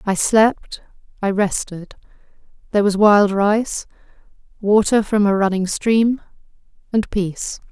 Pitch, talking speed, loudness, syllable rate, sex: 205 Hz, 110 wpm, -18 LUFS, 4.1 syllables/s, female